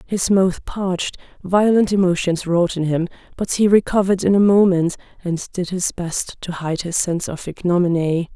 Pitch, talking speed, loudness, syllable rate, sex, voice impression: 180 Hz, 170 wpm, -19 LUFS, 4.9 syllables/s, female, feminine, slightly gender-neutral, slightly young, adult-like, slightly thin, slightly tensed, slightly powerful, slightly bright, hard, clear, fluent, slightly cool, intellectual, refreshing, slightly sincere, calm, slightly friendly, reassuring, elegant, slightly strict